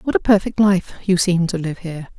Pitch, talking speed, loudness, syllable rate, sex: 180 Hz, 245 wpm, -18 LUFS, 5.5 syllables/s, female